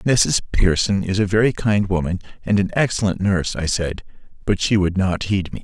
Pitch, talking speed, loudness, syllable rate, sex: 95 Hz, 200 wpm, -20 LUFS, 5.2 syllables/s, male